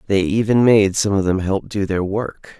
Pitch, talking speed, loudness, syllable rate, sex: 100 Hz, 230 wpm, -17 LUFS, 4.6 syllables/s, male